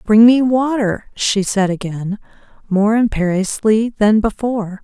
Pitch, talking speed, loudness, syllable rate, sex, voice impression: 210 Hz, 125 wpm, -16 LUFS, 4.2 syllables/s, female, feminine, adult-like, slightly soft, calm, slightly kind